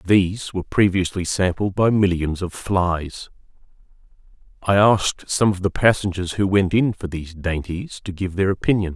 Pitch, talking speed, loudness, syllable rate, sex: 95 Hz, 160 wpm, -20 LUFS, 4.9 syllables/s, male